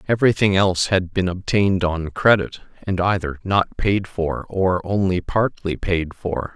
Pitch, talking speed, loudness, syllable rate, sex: 95 Hz, 155 wpm, -20 LUFS, 4.5 syllables/s, male